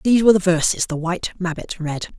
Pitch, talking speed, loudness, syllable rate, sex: 180 Hz, 220 wpm, -20 LUFS, 6.5 syllables/s, male